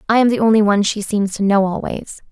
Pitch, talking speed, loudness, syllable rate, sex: 210 Hz, 260 wpm, -16 LUFS, 6.3 syllables/s, female